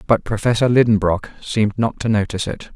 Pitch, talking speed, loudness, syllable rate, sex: 110 Hz, 175 wpm, -18 LUFS, 5.9 syllables/s, male